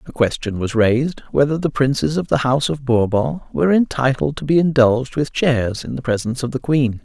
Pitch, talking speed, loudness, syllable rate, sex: 135 Hz, 215 wpm, -18 LUFS, 5.7 syllables/s, male